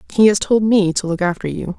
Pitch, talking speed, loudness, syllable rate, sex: 195 Hz, 270 wpm, -16 LUFS, 5.7 syllables/s, female